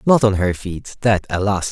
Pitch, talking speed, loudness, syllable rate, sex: 100 Hz, 210 wpm, -19 LUFS, 4.6 syllables/s, male